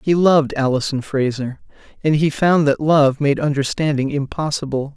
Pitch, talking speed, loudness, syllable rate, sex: 145 Hz, 145 wpm, -18 LUFS, 4.9 syllables/s, male